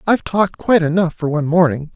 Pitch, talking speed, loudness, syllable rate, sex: 170 Hz, 215 wpm, -16 LUFS, 7.2 syllables/s, male